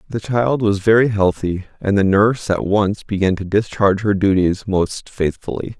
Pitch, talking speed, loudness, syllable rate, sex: 100 Hz, 175 wpm, -17 LUFS, 4.9 syllables/s, male